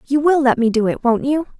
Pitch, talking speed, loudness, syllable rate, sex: 265 Hz, 300 wpm, -16 LUFS, 5.7 syllables/s, female